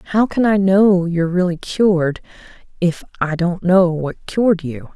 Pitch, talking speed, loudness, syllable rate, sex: 180 Hz, 155 wpm, -17 LUFS, 4.6 syllables/s, female